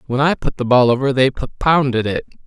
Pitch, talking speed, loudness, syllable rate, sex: 130 Hz, 245 wpm, -17 LUFS, 5.9 syllables/s, male